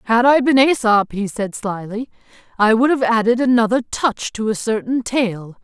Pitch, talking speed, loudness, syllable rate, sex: 230 Hz, 180 wpm, -17 LUFS, 4.7 syllables/s, female